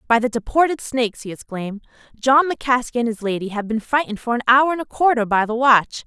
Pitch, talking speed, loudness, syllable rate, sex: 240 Hz, 230 wpm, -19 LUFS, 6.1 syllables/s, female